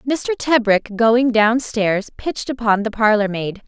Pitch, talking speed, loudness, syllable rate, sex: 225 Hz, 145 wpm, -17 LUFS, 4.1 syllables/s, female